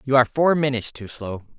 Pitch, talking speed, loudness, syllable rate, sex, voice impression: 130 Hz, 230 wpm, -21 LUFS, 6.3 syllables/s, male, very masculine, slightly young, slightly adult-like, slightly thick, slightly tensed, slightly weak, bright, slightly soft, clear, slightly fluent, slightly cool, intellectual, refreshing, very sincere, very calm, slightly friendly, slightly reassuring, very unique, elegant, slightly wild, sweet, slightly lively, kind, modest